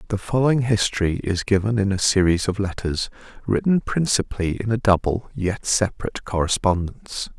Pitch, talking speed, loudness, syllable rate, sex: 105 Hz, 145 wpm, -22 LUFS, 5.5 syllables/s, male